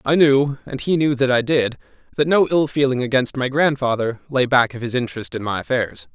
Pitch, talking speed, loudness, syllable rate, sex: 130 Hz, 205 wpm, -19 LUFS, 5.5 syllables/s, male